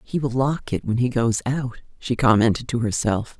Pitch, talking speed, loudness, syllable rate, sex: 120 Hz, 210 wpm, -22 LUFS, 4.8 syllables/s, female